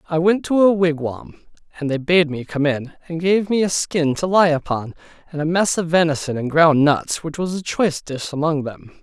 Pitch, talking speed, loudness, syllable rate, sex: 160 Hz, 225 wpm, -19 LUFS, 5.1 syllables/s, male